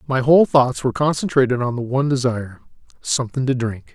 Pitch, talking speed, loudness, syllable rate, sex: 130 Hz, 165 wpm, -19 LUFS, 6.5 syllables/s, male